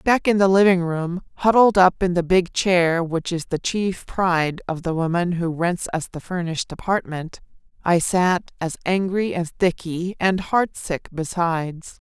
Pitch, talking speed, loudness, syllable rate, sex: 175 Hz, 170 wpm, -21 LUFS, 4.3 syllables/s, female